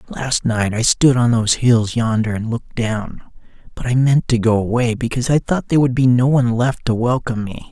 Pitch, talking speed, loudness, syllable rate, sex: 120 Hz, 225 wpm, -17 LUFS, 5.6 syllables/s, male